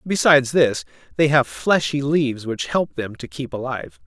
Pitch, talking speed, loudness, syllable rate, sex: 130 Hz, 175 wpm, -20 LUFS, 5.0 syllables/s, male